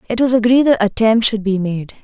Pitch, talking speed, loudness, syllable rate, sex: 220 Hz, 235 wpm, -15 LUFS, 5.8 syllables/s, female